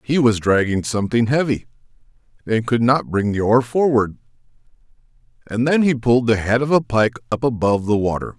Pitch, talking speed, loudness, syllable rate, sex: 120 Hz, 180 wpm, -18 LUFS, 5.7 syllables/s, male